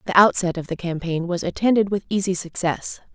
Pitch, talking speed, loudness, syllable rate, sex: 180 Hz, 190 wpm, -21 LUFS, 5.7 syllables/s, female